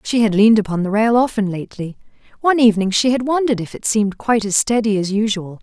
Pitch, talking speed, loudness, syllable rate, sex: 215 Hz, 225 wpm, -17 LUFS, 6.9 syllables/s, female